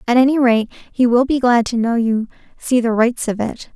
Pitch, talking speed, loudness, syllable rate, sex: 240 Hz, 240 wpm, -16 LUFS, 5.0 syllables/s, female